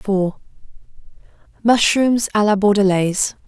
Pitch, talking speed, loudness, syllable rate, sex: 205 Hz, 70 wpm, -17 LUFS, 4.4 syllables/s, female